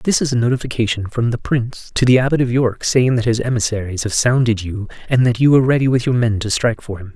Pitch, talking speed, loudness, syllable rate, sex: 120 Hz, 260 wpm, -17 LUFS, 6.5 syllables/s, male